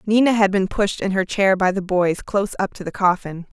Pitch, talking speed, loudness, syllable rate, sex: 195 Hz, 250 wpm, -19 LUFS, 5.4 syllables/s, female